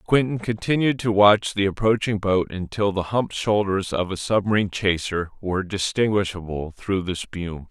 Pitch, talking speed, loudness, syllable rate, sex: 100 Hz, 155 wpm, -22 LUFS, 5.1 syllables/s, male